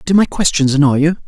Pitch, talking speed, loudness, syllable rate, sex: 155 Hz, 235 wpm, -13 LUFS, 6.4 syllables/s, male